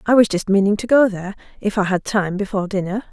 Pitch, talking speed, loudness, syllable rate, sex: 200 Hz, 250 wpm, -18 LUFS, 6.7 syllables/s, female